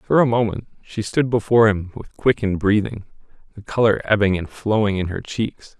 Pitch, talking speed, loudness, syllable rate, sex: 105 Hz, 185 wpm, -20 LUFS, 5.3 syllables/s, male